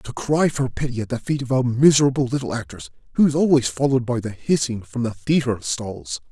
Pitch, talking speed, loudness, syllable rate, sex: 125 Hz, 210 wpm, -21 LUFS, 5.6 syllables/s, male